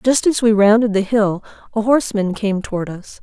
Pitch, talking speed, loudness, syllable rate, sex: 215 Hz, 205 wpm, -17 LUFS, 5.3 syllables/s, female